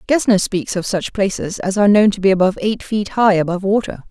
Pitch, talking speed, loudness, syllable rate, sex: 200 Hz, 235 wpm, -16 LUFS, 6.2 syllables/s, female